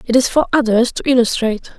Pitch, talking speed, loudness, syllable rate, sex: 245 Hz, 200 wpm, -15 LUFS, 6.3 syllables/s, female